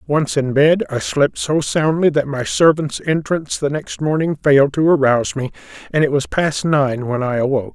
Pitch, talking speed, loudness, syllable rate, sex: 145 Hz, 200 wpm, -17 LUFS, 5.1 syllables/s, male